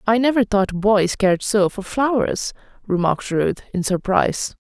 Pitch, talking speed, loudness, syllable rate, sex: 205 Hz, 155 wpm, -19 LUFS, 4.7 syllables/s, female